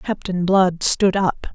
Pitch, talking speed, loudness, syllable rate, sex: 185 Hz, 155 wpm, -18 LUFS, 3.4 syllables/s, female